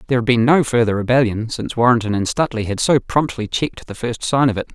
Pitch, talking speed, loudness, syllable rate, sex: 120 Hz, 240 wpm, -18 LUFS, 6.7 syllables/s, male